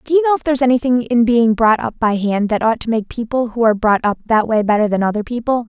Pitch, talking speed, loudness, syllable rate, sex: 230 Hz, 290 wpm, -16 LUFS, 6.5 syllables/s, female